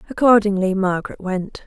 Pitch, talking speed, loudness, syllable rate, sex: 200 Hz, 110 wpm, -18 LUFS, 5.5 syllables/s, female